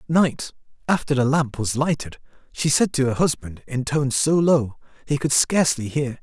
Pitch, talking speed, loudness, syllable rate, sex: 135 Hz, 195 wpm, -21 LUFS, 5.0 syllables/s, male